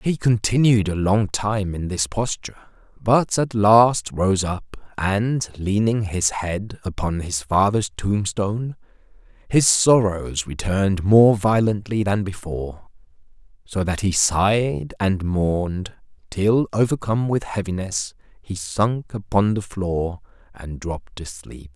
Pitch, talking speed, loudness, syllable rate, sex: 100 Hz, 125 wpm, -21 LUFS, 3.8 syllables/s, male